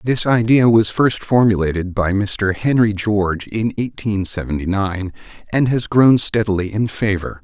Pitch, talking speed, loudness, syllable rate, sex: 105 Hz, 155 wpm, -17 LUFS, 4.5 syllables/s, male